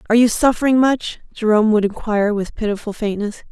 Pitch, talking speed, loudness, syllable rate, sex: 220 Hz, 170 wpm, -17 LUFS, 6.6 syllables/s, female